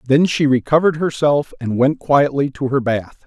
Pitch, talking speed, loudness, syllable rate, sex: 140 Hz, 185 wpm, -17 LUFS, 4.9 syllables/s, male